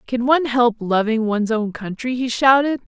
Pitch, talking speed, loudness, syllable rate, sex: 240 Hz, 185 wpm, -18 LUFS, 5.3 syllables/s, female